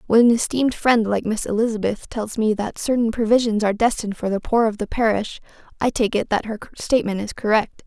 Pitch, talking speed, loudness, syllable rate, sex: 220 Hz, 215 wpm, -20 LUFS, 6.1 syllables/s, female